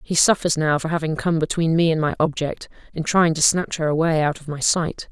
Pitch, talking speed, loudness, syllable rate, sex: 160 Hz, 235 wpm, -20 LUFS, 5.5 syllables/s, female